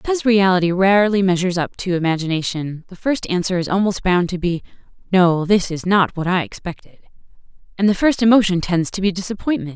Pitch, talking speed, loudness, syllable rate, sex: 185 Hz, 185 wpm, -18 LUFS, 6.1 syllables/s, female